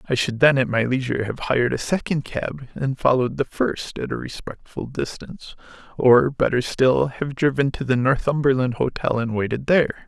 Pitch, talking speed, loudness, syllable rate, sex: 130 Hz, 185 wpm, -21 LUFS, 5.3 syllables/s, male